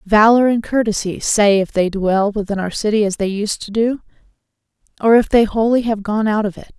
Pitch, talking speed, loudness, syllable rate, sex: 210 Hz, 210 wpm, -16 LUFS, 5.3 syllables/s, female